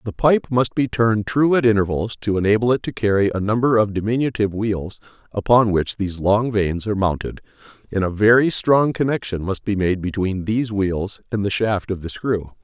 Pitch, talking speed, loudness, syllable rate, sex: 105 Hz, 200 wpm, -20 LUFS, 5.5 syllables/s, male